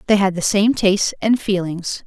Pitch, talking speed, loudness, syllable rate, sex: 195 Hz, 205 wpm, -18 LUFS, 5.0 syllables/s, female